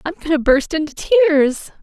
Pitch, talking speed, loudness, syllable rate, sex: 280 Hz, 195 wpm, -16 LUFS, 4.3 syllables/s, female